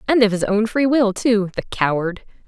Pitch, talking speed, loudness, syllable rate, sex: 215 Hz, 220 wpm, -19 LUFS, 5.1 syllables/s, female